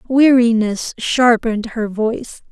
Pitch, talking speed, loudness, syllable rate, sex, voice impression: 230 Hz, 95 wpm, -16 LUFS, 4.0 syllables/s, female, feminine, adult-like, tensed, powerful, bright, clear, intellectual, calm, friendly, slightly unique, lively, kind, slightly modest